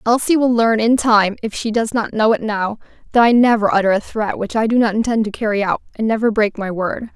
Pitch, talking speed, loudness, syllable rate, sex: 220 Hz, 260 wpm, -17 LUFS, 5.7 syllables/s, female